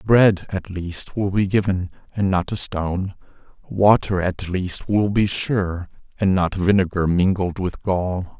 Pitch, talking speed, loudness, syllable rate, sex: 95 Hz, 155 wpm, -21 LUFS, 3.9 syllables/s, male